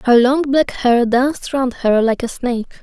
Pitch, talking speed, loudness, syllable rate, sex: 250 Hz, 210 wpm, -16 LUFS, 4.7 syllables/s, female